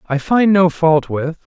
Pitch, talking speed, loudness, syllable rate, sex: 165 Hz, 195 wpm, -15 LUFS, 3.9 syllables/s, male